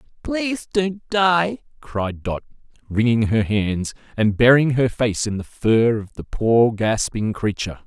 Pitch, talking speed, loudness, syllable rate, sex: 125 Hz, 160 wpm, -20 LUFS, 4.1 syllables/s, male